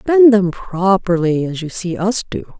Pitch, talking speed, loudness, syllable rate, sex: 190 Hz, 185 wpm, -16 LUFS, 4.2 syllables/s, female